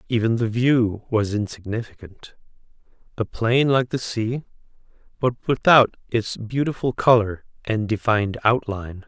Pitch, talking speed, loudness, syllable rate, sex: 115 Hz, 110 wpm, -21 LUFS, 4.6 syllables/s, male